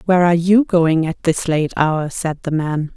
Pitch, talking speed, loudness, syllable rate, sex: 165 Hz, 225 wpm, -17 LUFS, 4.7 syllables/s, female